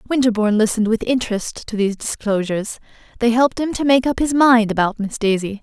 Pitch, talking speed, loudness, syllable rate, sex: 230 Hz, 190 wpm, -18 LUFS, 6.4 syllables/s, female